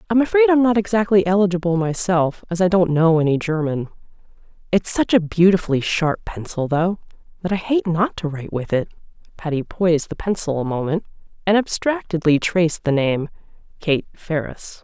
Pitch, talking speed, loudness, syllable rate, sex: 175 Hz, 165 wpm, -19 LUFS, 5.4 syllables/s, female